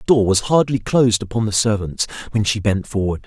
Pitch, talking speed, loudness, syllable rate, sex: 110 Hz, 220 wpm, -18 LUFS, 5.7 syllables/s, male